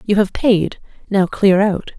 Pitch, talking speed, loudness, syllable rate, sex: 195 Hz, 180 wpm, -16 LUFS, 3.8 syllables/s, female